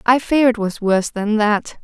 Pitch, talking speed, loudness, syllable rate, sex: 220 Hz, 230 wpm, -17 LUFS, 4.8 syllables/s, female